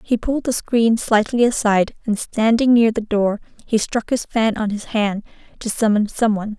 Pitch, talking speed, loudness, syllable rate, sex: 220 Hz, 200 wpm, -18 LUFS, 5.0 syllables/s, female